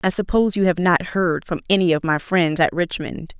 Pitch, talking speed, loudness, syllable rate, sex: 175 Hz, 230 wpm, -19 LUFS, 5.3 syllables/s, female